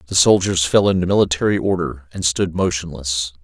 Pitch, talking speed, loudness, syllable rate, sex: 85 Hz, 155 wpm, -18 LUFS, 5.5 syllables/s, male